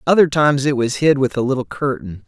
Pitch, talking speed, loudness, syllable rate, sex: 130 Hz, 240 wpm, -17 LUFS, 6.1 syllables/s, male